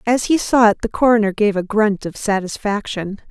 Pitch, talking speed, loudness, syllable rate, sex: 210 Hz, 200 wpm, -17 LUFS, 5.3 syllables/s, female